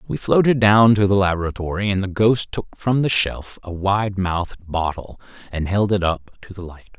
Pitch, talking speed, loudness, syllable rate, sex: 100 Hz, 205 wpm, -19 LUFS, 5.1 syllables/s, male